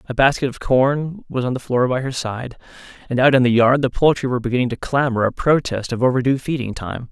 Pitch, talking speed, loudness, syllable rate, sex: 130 Hz, 235 wpm, -19 LUFS, 6.0 syllables/s, male